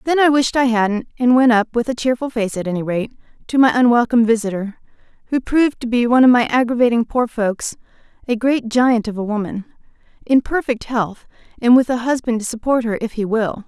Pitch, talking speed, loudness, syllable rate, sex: 235 Hz, 210 wpm, -17 LUFS, 5.7 syllables/s, female